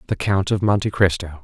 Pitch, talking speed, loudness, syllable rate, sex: 95 Hz, 210 wpm, -19 LUFS, 5.7 syllables/s, male